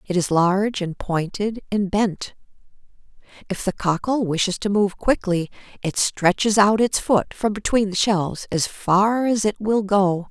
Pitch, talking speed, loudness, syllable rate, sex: 200 Hz, 170 wpm, -21 LUFS, 4.2 syllables/s, female